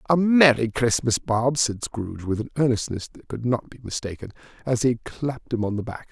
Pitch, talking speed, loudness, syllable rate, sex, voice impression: 120 Hz, 205 wpm, -23 LUFS, 5.4 syllables/s, male, very masculine, very adult-like, thick, cool, calm, elegant